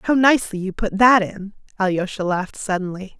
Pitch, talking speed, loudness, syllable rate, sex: 200 Hz, 170 wpm, -19 LUFS, 5.5 syllables/s, female